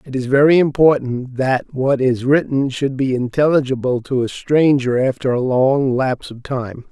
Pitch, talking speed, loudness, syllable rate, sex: 130 Hz, 175 wpm, -17 LUFS, 4.6 syllables/s, male